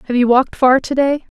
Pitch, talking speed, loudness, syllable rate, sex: 260 Hz, 260 wpm, -14 LUFS, 6.3 syllables/s, female